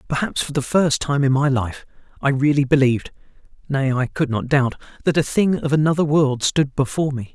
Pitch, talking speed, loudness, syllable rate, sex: 140 Hz, 205 wpm, -19 LUFS, 5.2 syllables/s, male